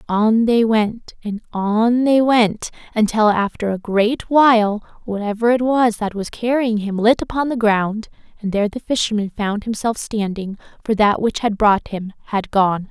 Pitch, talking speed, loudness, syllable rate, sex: 220 Hz, 175 wpm, -18 LUFS, 4.4 syllables/s, female